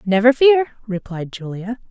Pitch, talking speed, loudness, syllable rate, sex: 225 Hz, 125 wpm, -18 LUFS, 4.6 syllables/s, female